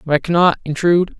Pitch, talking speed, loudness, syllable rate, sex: 165 Hz, 200 wpm, -16 LUFS, 6.8 syllables/s, male